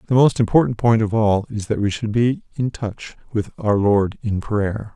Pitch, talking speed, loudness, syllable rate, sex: 110 Hz, 220 wpm, -20 LUFS, 4.6 syllables/s, male